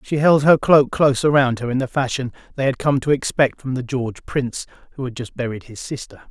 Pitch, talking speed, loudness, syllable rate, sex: 130 Hz, 240 wpm, -19 LUFS, 5.9 syllables/s, male